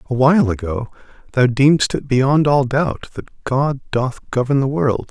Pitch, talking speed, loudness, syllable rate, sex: 135 Hz, 165 wpm, -17 LUFS, 4.4 syllables/s, male